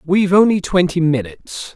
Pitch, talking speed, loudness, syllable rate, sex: 170 Hz, 135 wpm, -15 LUFS, 5.5 syllables/s, male